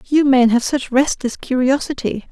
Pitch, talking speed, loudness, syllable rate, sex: 260 Hz, 155 wpm, -17 LUFS, 4.5 syllables/s, female